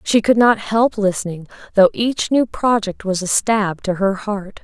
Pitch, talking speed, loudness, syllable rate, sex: 205 Hz, 195 wpm, -17 LUFS, 4.3 syllables/s, female